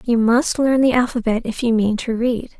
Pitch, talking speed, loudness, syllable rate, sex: 235 Hz, 230 wpm, -18 LUFS, 5.0 syllables/s, female